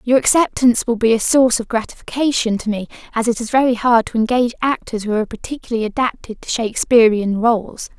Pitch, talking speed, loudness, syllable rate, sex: 235 Hz, 190 wpm, -17 LUFS, 6.4 syllables/s, female